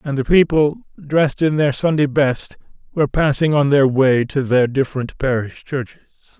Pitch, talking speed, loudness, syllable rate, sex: 140 Hz, 170 wpm, -17 LUFS, 5.0 syllables/s, male